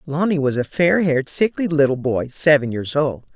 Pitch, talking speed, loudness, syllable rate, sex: 150 Hz, 195 wpm, -19 LUFS, 5.1 syllables/s, female